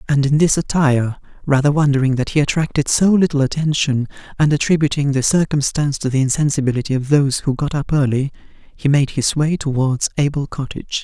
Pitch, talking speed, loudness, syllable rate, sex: 140 Hz, 175 wpm, -17 LUFS, 6.0 syllables/s, male